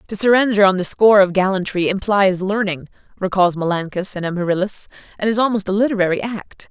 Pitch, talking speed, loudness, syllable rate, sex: 195 Hz, 170 wpm, -17 LUFS, 6.1 syllables/s, female